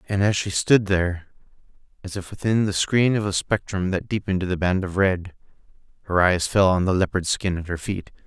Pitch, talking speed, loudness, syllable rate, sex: 95 Hz, 220 wpm, -22 LUFS, 5.5 syllables/s, male